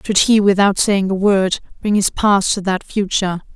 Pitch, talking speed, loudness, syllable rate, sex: 195 Hz, 200 wpm, -16 LUFS, 4.8 syllables/s, female